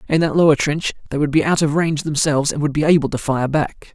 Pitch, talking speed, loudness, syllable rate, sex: 150 Hz, 275 wpm, -18 LUFS, 6.4 syllables/s, male